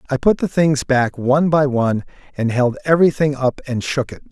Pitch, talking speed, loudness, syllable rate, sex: 140 Hz, 210 wpm, -17 LUFS, 5.6 syllables/s, male